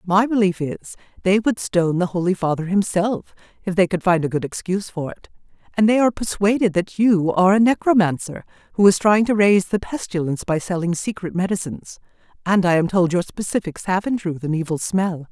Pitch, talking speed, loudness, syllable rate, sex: 185 Hz, 195 wpm, -20 LUFS, 5.8 syllables/s, female